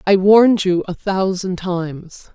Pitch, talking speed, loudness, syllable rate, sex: 185 Hz, 155 wpm, -16 LUFS, 4.2 syllables/s, female